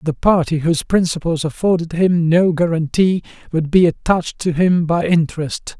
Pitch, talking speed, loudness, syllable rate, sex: 165 Hz, 155 wpm, -17 LUFS, 5.0 syllables/s, male